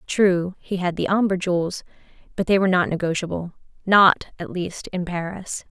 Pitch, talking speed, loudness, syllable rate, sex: 180 Hz, 155 wpm, -22 LUFS, 5.1 syllables/s, female